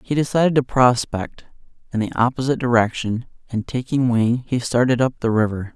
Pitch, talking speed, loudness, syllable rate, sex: 125 Hz, 165 wpm, -20 LUFS, 5.6 syllables/s, male